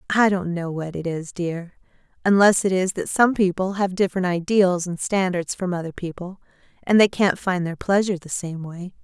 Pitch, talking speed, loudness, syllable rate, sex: 180 Hz, 200 wpm, -21 LUFS, 5.1 syllables/s, female